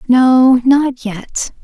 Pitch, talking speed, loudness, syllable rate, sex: 250 Hz, 110 wpm, -12 LUFS, 2.2 syllables/s, female